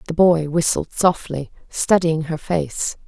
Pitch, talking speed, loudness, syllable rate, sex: 160 Hz, 135 wpm, -19 LUFS, 3.8 syllables/s, female